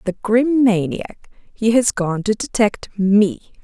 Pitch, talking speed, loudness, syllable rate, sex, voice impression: 215 Hz, 150 wpm, -17 LUFS, 3.6 syllables/s, female, very feminine, very adult-like, slightly middle-aged, very thin, very relaxed, very weak, dark, very soft, muffled, slightly fluent, cute, slightly cool, very intellectual, slightly refreshing, sincere, very calm, very friendly, very reassuring, very unique, very elegant, sweet, very kind, modest